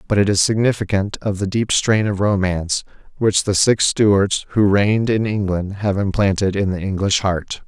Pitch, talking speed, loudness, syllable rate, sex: 100 Hz, 190 wpm, -18 LUFS, 4.9 syllables/s, male